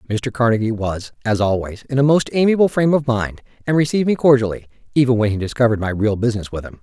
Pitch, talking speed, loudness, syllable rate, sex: 120 Hz, 220 wpm, -18 LUFS, 6.9 syllables/s, male